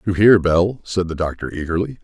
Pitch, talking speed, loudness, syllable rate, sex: 95 Hz, 205 wpm, -18 LUFS, 5.3 syllables/s, male